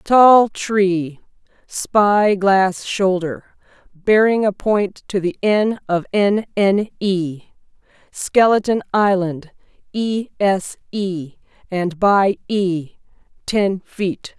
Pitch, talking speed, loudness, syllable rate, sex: 195 Hz, 105 wpm, -18 LUFS, 2.9 syllables/s, female